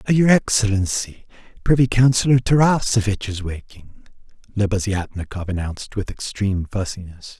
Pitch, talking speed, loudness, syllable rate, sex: 105 Hz, 95 wpm, -20 LUFS, 5.1 syllables/s, male